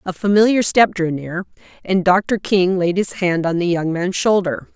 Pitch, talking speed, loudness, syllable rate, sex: 185 Hz, 200 wpm, -17 LUFS, 4.5 syllables/s, female